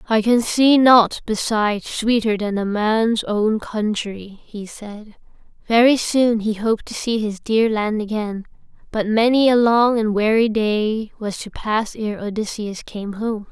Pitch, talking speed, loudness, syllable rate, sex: 220 Hz, 165 wpm, -19 LUFS, 3.9 syllables/s, female